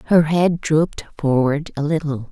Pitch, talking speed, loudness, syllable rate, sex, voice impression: 150 Hz, 155 wpm, -19 LUFS, 4.7 syllables/s, female, very feminine, very middle-aged, thin, slightly tensed, slightly weak, bright, very soft, very clear, very fluent, cute, very intellectual, very refreshing, sincere, calm, very friendly, very reassuring, very unique, very elegant, very sweet, lively, very kind, modest